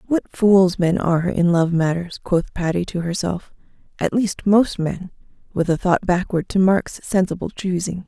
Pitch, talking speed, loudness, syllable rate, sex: 180 Hz, 165 wpm, -20 LUFS, 4.5 syllables/s, female